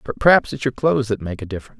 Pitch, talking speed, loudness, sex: 120 Hz, 270 wpm, -19 LUFS, male